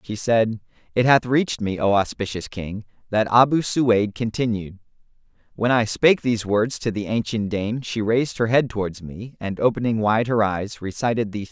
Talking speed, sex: 195 wpm, male